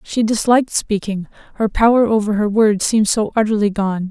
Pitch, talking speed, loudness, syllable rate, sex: 215 Hz, 175 wpm, -16 LUFS, 5.5 syllables/s, female